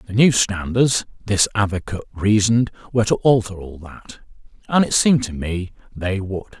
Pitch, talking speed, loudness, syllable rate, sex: 105 Hz, 165 wpm, -19 LUFS, 5.2 syllables/s, male